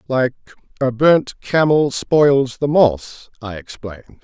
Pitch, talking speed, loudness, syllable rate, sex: 130 Hz, 130 wpm, -16 LUFS, 3.7 syllables/s, male